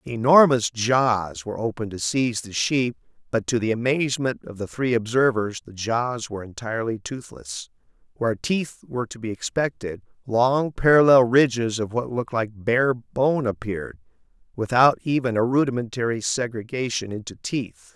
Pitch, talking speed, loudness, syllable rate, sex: 120 Hz, 145 wpm, -23 LUFS, 5.0 syllables/s, male